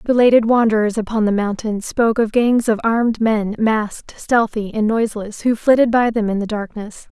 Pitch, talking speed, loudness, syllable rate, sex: 220 Hz, 185 wpm, -17 LUFS, 5.2 syllables/s, female